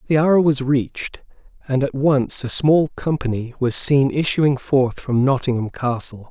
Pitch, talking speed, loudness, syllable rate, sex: 135 Hz, 160 wpm, -19 LUFS, 4.2 syllables/s, male